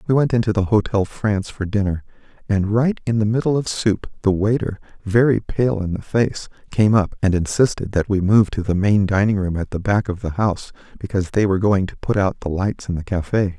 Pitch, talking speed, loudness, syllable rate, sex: 100 Hz, 230 wpm, -19 LUFS, 5.6 syllables/s, male